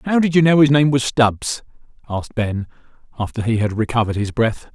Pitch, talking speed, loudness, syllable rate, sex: 125 Hz, 200 wpm, -18 LUFS, 5.8 syllables/s, male